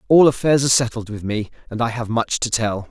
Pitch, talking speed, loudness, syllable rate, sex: 120 Hz, 250 wpm, -19 LUFS, 5.9 syllables/s, male